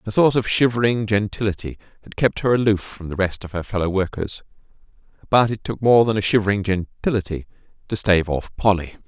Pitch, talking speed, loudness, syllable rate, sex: 100 Hz, 185 wpm, -20 LUFS, 5.9 syllables/s, male